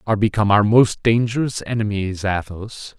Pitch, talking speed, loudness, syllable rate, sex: 105 Hz, 140 wpm, -18 LUFS, 5.3 syllables/s, male